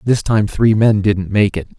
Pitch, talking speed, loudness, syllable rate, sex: 105 Hz, 235 wpm, -15 LUFS, 4.5 syllables/s, male